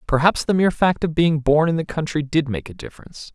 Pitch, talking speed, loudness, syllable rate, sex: 155 Hz, 250 wpm, -19 LUFS, 6.2 syllables/s, male